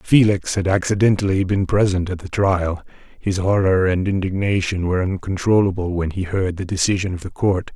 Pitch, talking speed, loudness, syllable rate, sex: 95 Hz, 170 wpm, -19 LUFS, 5.3 syllables/s, male